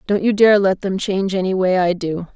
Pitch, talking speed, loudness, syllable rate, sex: 190 Hz, 255 wpm, -17 LUFS, 5.5 syllables/s, female